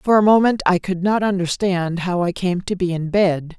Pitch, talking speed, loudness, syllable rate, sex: 185 Hz, 235 wpm, -18 LUFS, 4.8 syllables/s, female